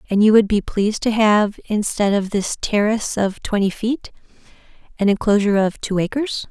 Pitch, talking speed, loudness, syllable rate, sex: 210 Hz, 175 wpm, -18 LUFS, 5.2 syllables/s, female